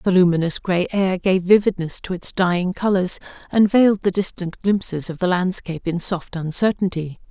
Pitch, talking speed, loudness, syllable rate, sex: 185 Hz, 175 wpm, -20 LUFS, 5.2 syllables/s, female